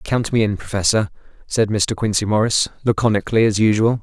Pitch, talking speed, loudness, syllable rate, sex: 105 Hz, 165 wpm, -18 LUFS, 5.7 syllables/s, male